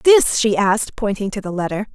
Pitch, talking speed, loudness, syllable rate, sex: 215 Hz, 215 wpm, -18 LUFS, 5.6 syllables/s, female